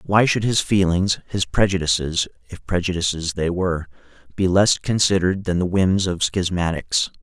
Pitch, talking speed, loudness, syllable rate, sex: 95 Hz, 150 wpm, -20 LUFS, 5.1 syllables/s, male